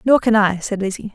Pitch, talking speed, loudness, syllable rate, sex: 205 Hz, 260 wpm, -18 LUFS, 5.7 syllables/s, female